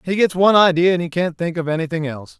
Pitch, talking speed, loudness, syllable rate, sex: 170 Hz, 275 wpm, -17 LUFS, 7.1 syllables/s, male